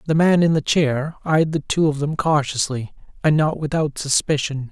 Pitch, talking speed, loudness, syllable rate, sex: 150 Hz, 190 wpm, -20 LUFS, 4.8 syllables/s, male